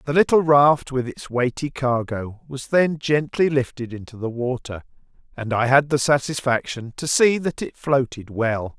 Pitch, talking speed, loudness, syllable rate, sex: 130 Hz, 170 wpm, -21 LUFS, 4.5 syllables/s, male